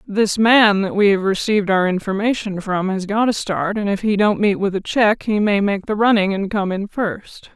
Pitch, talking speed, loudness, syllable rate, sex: 205 Hz, 240 wpm, -18 LUFS, 4.9 syllables/s, female